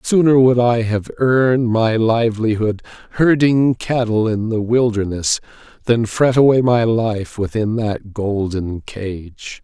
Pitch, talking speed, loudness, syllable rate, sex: 115 Hz, 130 wpm, -17 LUFS, 3.8 syllables/s, male